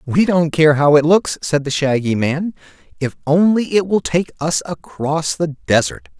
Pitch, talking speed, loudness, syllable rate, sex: 155 Hz, 185 wpm, -16 LUFS, 4.3 syllables/s, male